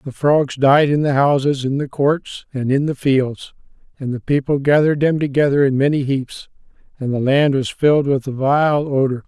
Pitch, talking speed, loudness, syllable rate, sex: 140 Hz, 200 wpm, -17 LUFS, 4.9 syllables/s, male